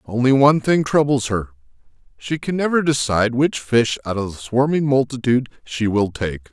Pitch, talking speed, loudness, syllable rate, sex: 125 Hz, 175 wpm, -19 LUFS, 5.4 syllables/s, male